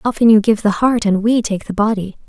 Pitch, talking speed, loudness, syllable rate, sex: 215 Hz, 265 wpm, -15 LUFS, 5.7 syllables/s, female